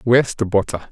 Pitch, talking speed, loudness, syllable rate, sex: 110 Hz, 195 wpm, -18 LUFS, 6.2 syllables/s, male